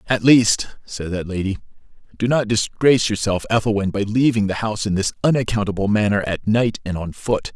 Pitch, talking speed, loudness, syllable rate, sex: 105 Hz, 185 wpm, -19 LUFS, 5.6 syllables/s, male